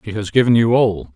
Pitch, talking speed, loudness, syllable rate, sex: 105 Hz, 260 wpm, -16 LUFS, 5.9 syllables/s, male